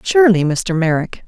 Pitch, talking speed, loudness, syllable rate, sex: 190 Hz, 140 wpm, -15 LUFS, 5.1 syllables/s, female